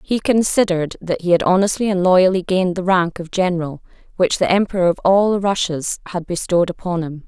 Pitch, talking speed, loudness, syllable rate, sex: 180 Hz, 200 wpm, -17 LUFS, 5.9 syllables/s, female